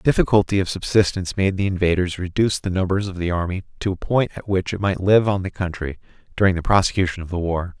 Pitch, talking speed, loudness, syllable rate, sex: 95 Hz, 225 wpm, -21 LUFS, 6.4 syllables/s, male